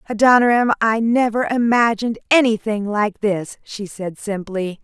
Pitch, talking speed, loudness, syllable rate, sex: 220 Hz, 125 wpm, -18 LUFS, 4.6 syllables/s, female